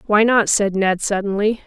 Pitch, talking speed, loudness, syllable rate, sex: 205 Hz, 180 wpm, -17 LUFS, 4.8 syllables/s, female